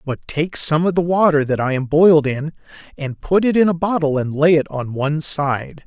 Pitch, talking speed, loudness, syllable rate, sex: 155 Hz, 235 wpm, -17 LUFS, 5.1 syllables/s, male